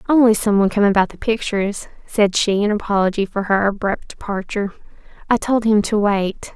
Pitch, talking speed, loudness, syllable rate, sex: 205 Hz, 185 wpm, -18 LUFS, 5.7 syllables/s, female